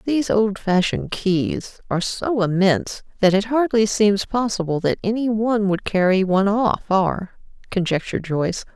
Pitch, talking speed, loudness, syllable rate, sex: 200 Hz, 135 wpm, -20 LUFS, 5.0 syllables/s, female